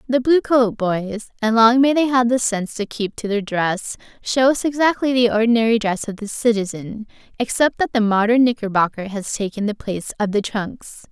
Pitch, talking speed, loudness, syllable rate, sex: 225 Hz, 195 wpm, -19 LUFS, 5.1 syllables/s, female